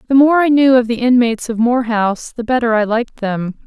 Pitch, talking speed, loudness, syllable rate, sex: 240 Hz, 245 wpm, -14 LUFS, 5.9 syllables/s, female